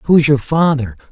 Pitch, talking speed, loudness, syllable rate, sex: 140 Hz, 160 wpm, -14 LUFS, 4.2 syllables/s, male